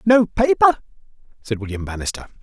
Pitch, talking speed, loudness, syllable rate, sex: 140 Hz, 125 wpm, -19 LUFS, 5.5 syllables/s, male